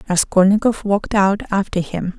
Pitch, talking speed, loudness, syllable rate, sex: 200 Hz, 135 wpm, -17 LUFS, 5.3 syllables/s, female